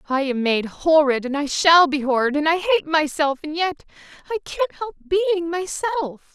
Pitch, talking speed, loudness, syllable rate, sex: 315 Hz, 190 wpm, -20 LUFS, 5.3 syllables/s, female